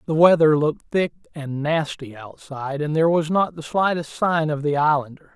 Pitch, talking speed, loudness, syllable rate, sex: 155 Hz, 190 wpm, -21 LUFS, 5.3 syllables/s, male